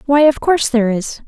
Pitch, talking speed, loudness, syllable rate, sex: 260 Hz, 235 wpm, -15 LUFS, 6.3 syllables/s, female